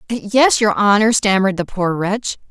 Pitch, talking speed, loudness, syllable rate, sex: 205 Hz, 170 wpm, -15 LUFS, 4.6 syllables/s, female